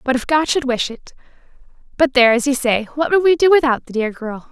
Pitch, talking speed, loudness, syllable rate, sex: 265 Hz, 240 wpm, -16 LUFS, 6.0 syllables/s, female